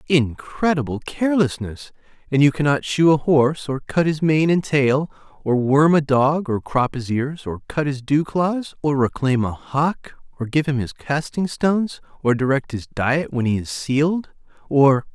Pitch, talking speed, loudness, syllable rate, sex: 145 Hz, 180 wpm, -20 LUFS, 4.5 syllables/s, male